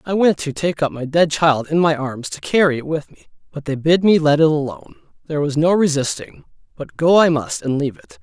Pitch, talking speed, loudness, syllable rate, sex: 155 Hz, 250 wpm, -18 LUFS, 5.7 syllables/s, male